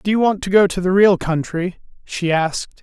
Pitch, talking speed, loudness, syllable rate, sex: 185 Hz, 235 wpm, -17 LUFS, 5.1 syllables/s, male